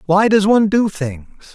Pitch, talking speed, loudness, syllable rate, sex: 190 Hz, 195 wpm, -15 LUFS, 5.2 syllables/s, male